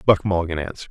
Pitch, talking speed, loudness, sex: 90 Hz, 200 wpm, -22 LUFS, male